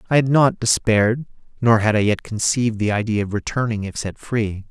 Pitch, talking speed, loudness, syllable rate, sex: 110 Hz, 205 wpm, -19 LUFS, 5.6 syllables/s, male